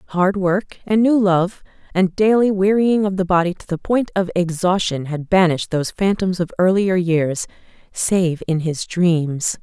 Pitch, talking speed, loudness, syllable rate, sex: 185 Hz, 170 wpm, -18 LUFS, 4.4 syllables/s, female